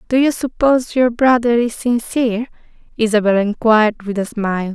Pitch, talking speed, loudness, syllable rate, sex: 230 Hz, 140 wpm, -16 LUFS, 5.2 syllables/s, female